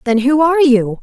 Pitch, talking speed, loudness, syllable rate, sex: 270 Hz, 235 wpm, -12 LUFS, 5.6 syllables/s, female